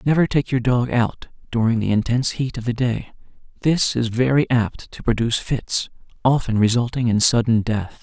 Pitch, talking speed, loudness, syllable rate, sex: 120 Hz, 180 wpm, -20 LUFS, 5.1 syllables/s, male